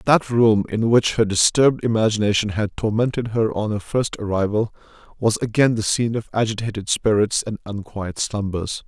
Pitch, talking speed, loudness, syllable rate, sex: 110 Hz, 160 wpm, -20 LUFS, 5.2 syllables/s, male